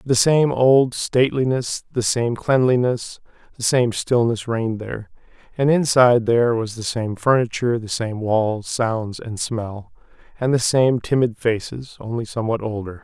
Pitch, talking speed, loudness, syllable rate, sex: 115 Hz, 150 wpm, -20 LUFS, 4.6 syllables/s, male